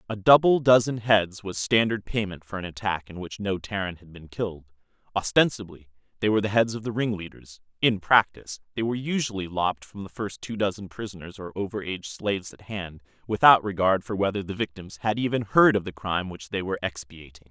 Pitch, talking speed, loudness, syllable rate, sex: 100 Hz, 200 wpm, -25 LUFS, 5.9 syllables/s, male